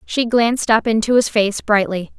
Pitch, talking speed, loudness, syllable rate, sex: 220 Hz, 190 wpm, -16 LUFS, 4.9 syllables/s, female